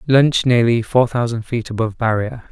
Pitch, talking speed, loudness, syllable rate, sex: 120 Hz, 165 wpm, -17 LUFS, 5.2 syllables/s, male